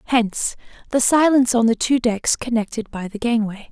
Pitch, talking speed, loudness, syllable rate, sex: 235 Hz, 180 wpm, -19 LUFS, 5.4 syllables/s, female